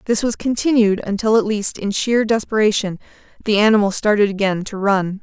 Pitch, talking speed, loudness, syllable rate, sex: 210 Hz, 170 wpm, -17 LUFS, 5.5 syllables/s, female